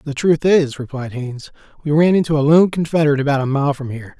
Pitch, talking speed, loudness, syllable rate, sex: 145 Hz, 230 wpm, -16 LUFS, 6.7 syllables/s, male